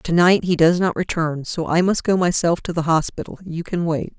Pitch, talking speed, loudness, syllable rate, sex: 170 Hz, 230 wpm, -19 LUFS, 5.2 syllables/s, female